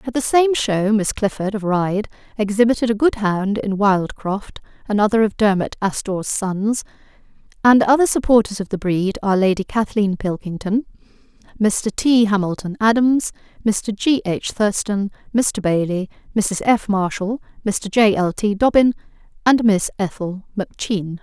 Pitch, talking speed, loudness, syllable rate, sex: 210 Hz, 145 wpm, -19 LUFS, 4.8 syllables/s, female